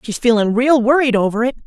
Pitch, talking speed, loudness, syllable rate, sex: 240 Hz, 215 wpm, -15 LUFS, 6.1 syllables/s, female